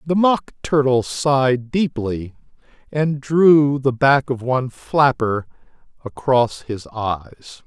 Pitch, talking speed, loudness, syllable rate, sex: 130 Hz, 115 wpm, -19 LUFS, 3.4 syllables/s, male